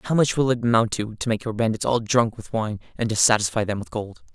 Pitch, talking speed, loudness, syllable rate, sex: 115 Hz, 275 wpm, -22 LUFS, 5.9 syllables/s, male